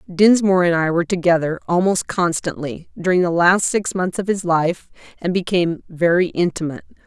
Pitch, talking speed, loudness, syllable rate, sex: 175 Hz, 160 wpm, -18 LUFS, 5.4 syllables/s, female